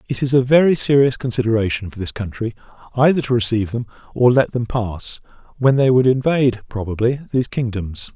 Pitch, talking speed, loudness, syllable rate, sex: 120 Hz, 175 wpm, -18 LUFS, 6.0 syllables/s, male